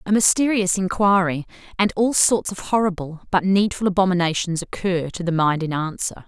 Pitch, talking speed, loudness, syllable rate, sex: 185 Hz, 165 wpm, -20 LUFS, 5.3 syllables/s, female